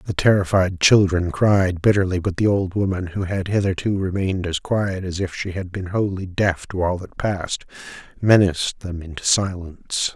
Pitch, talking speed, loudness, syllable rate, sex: 95 Hz, 175 wpm, -21 LUFS, 4.9 syllables/s, male